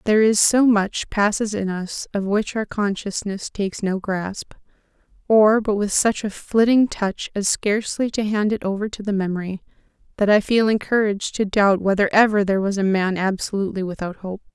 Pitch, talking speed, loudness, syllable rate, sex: 205 Hz, 175 wpm, -20 LUFS, 5.2 syllables/s, female